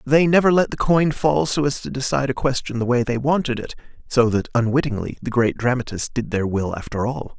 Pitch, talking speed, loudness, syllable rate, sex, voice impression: 130 Hz, 230 wpm, -20 LUFS, 5.8 syllables/s, male, masculine, middle-aged, tensed, powerful, bright, slightly muffled, raspy, mature, friendly, wild, lively, slightly strict, intense